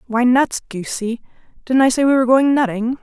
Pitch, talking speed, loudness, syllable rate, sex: 250 Hz, 200 wpm, -16 LUFS, 5.5 syllables/s, female